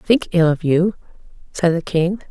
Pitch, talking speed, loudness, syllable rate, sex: 175 Hz, 180 wpm, -18 LUFS, 4.3 syllables/s, female